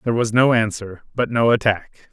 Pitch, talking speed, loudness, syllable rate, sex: 115 Hz, 200 wpm, -18 LUFS, 5.4 syllables/s, male